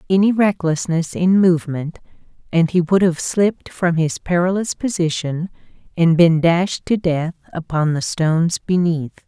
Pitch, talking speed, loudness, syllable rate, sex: 170 Hz, 140 wpm, -18 LUFS, 4.5 syllables/s, female